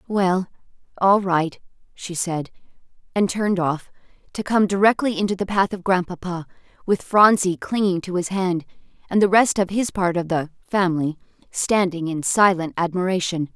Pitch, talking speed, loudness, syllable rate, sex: 185 Hz, 155 wpm, -21 LUFS, 4.9 syllables/s, female